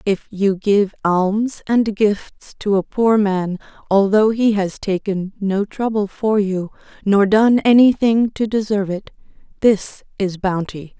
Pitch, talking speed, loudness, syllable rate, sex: 205 Hz, 145 wpm, -18 LUFS, 3.8 syllables/s, female